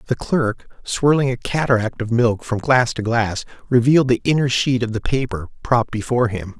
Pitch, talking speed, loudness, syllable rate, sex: 120 Hz, 190 wpm, -19 LUFS, 5.3 syllables/s, male